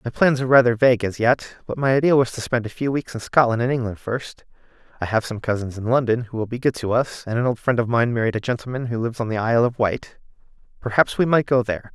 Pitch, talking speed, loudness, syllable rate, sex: 120 Hz, 265 wpm, -21 LUFS, 6.5 syllables/s, male